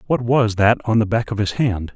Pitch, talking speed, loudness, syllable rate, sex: 110 Hz, 275 wpm, -18 LUFS, 5.1 syllables/s, male